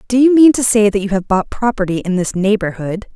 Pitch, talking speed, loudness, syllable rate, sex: 210 Hz, 245 wpm, -14 LUFS, 5.8 syllables/s, female